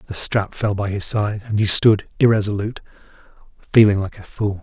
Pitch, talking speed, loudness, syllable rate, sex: 105 Hz, 180 wpm, -19 LUFS, 5.6 syllables/s, male